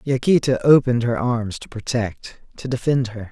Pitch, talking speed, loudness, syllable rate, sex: 120 Hz, 165 wpm, -20 LUFS, 4.9 syllables/s, male